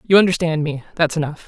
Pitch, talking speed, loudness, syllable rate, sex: 160 Hz, 205 wpm, -19 LUFS, 6.5 syllables/s, female